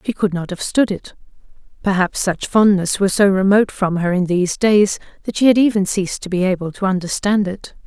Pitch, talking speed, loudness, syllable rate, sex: 195 Hz, 215 wpm, -17 LUFS, 5.6 syllables/s, female